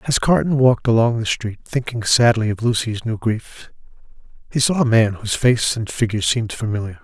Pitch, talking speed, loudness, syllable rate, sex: 115 Hz, 190 wpm, -18 LUFS, 5.6 syllables/s, male